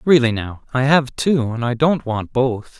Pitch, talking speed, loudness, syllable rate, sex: 130 Hz, 215 wpm, -18 LUFS, 4.2 syllables/s, male